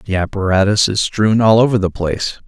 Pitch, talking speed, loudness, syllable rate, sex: 100 Hz, 195 wpm, -15 LUFS, 5.5 syllables/s, male